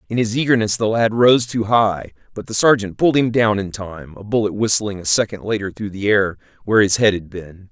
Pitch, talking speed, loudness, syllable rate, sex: 105 Hz, 235 wpm, -17 LUFS, 5.6 syllables/s, male